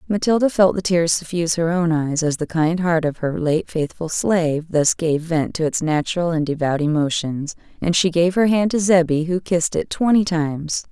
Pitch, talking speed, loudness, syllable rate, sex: 165 Hz, 210 wpm, -19 LUFS, 5.1 syllables/s, female